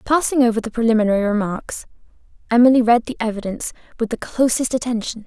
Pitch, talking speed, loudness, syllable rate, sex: 230 Hz, 150 wpm, -18 LUFS, 6.6 syllables/s, female